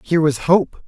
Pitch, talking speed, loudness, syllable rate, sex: 160 Hz, 205 wpm, -17 LUFS, 5.2 syllables/s, male